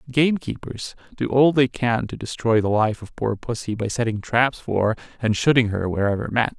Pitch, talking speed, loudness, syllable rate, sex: 115 Hz, 190 wpm, -22 LUFS, 5.1 syllables/s, male